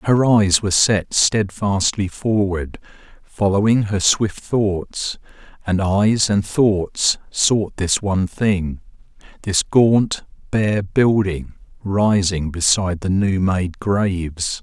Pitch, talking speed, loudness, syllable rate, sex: 100 Hz, 115 wpm, -18 LUFS, 3.2 syllables/s, male